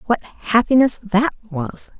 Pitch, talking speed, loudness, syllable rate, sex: 220 Hz, 120 wpm, -18 LUFS, 3.8 syllables/s, female